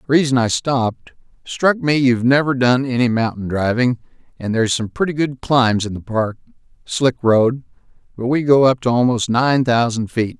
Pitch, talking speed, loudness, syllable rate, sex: 125 Hz, 180 wpm, -17 LUFS, 5.0 syllables/s, male